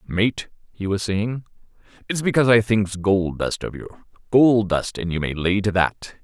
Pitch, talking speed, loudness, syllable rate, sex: 105 Hz, 185 wpm, -21 LUFS, 4.4 syllables/s, male